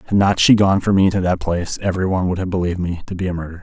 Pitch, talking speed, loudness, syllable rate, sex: 90 Hz, 315 wpm, -18 LUFS, 7.8 syllables/s, male